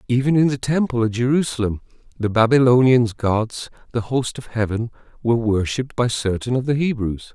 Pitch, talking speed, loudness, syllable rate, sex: 120 Hz, 165 wpm, -20 LUFS, 5.5 syllables/s, male